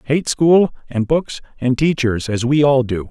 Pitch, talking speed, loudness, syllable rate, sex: 135 Hz, 195 wpm, -17 LUFS, 4.1 syllables/s, male